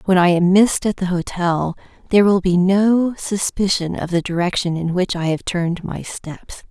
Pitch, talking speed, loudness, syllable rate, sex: 185 Hz, 195 wpm, -18 LUFS, 4.9 syllables/s, female